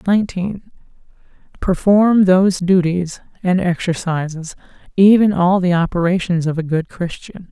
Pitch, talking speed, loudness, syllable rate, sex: 180 Hz, 110 wpm, -16 LUFS, 4.6 syllables/s, female